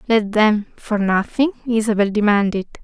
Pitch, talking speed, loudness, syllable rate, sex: 215 Hz, 125 wpm, -18 LUFS, 4.9 syllables/s, female